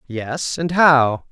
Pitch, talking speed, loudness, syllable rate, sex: 140 Hz, 135 wpm, -17 LUFS, 2.6 syllables/s, male